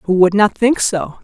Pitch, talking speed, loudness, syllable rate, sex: 200 Hz, 245 wpm, -14 LUFS, 4.4 syllables/s, female